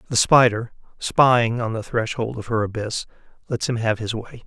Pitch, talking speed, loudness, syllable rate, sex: 115 Hz, 190 wpm, -21 LUFS, 4.8 syllables/s, male